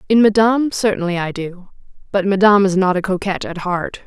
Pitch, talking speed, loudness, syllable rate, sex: 195 Hz, 190 wpm, -16 LUFS, 6.2 syllables/s, female